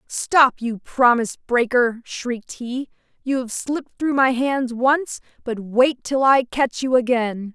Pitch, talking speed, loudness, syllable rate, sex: 250 Hz, 160 wpm, -20 LUFS, 3.9 syllables/s, female